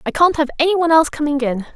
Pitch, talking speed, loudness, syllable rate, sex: 300 Hz, 275 wpm, -16 LUFS, 8.1 syllables/s, female